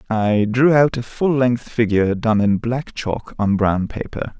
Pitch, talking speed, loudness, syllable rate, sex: 115 Hz, 190 wpm, -18 LUFS, 4.1 syllables/s, male